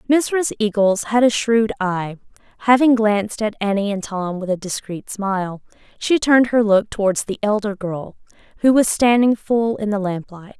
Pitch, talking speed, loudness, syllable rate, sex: 210 Hz, 175 wpm, -18 LUFS, 4.8 syllables/s, female